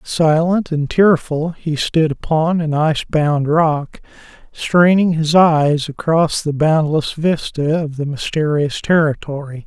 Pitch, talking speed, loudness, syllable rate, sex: 155 Hz, 130 wpm, -16 LUFS, 3.8 syllables/s, male